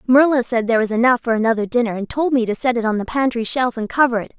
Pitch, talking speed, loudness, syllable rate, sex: 240 Hz, 285 wpm, -18 LUFS, 7.1 syllables/s, female